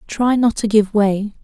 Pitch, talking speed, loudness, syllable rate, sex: 215 Hz, 210 wpm, -16 LUFS, 4.0 syllables/s, female